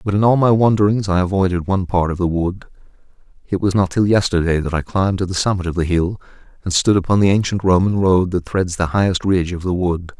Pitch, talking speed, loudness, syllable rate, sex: 95 Hz, 240 wpm, -17 LUFS, 6.2 syllables/s, male